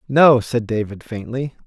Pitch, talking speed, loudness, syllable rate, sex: 120 Hz, 145 wpm, -18 LUFS, 4.2 syllables/s, male